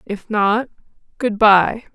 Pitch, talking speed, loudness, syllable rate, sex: 210 Hz, 125 wpm, -17 LUFS, 3.2 syllables/s, female